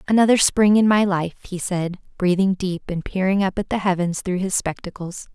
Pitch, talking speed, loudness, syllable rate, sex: 190 Hz, 200 wpm, -20 LUFS, 5.3 syllables/s, female